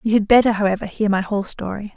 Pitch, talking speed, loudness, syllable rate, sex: 205 Hz, 245 wpm, -19 LUFS, 7.0 syllables/s, female